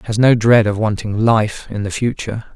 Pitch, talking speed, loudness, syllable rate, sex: 110 Hz, 210 wpm, -16 LUFS, 5.2 syllables/s, male